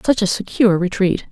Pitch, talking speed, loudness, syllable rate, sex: 195 Hz, 185 wpm, -17 LUFS, 5.9 syllables/s, female